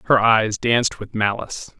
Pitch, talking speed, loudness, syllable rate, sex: 115 Hz, 165 wpm, -19 LUFS, 5.1 syllables/s, male